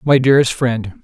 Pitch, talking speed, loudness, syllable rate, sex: 135 Hz, 175 wpm, -14 LUFS, 5.8 syllables/s, male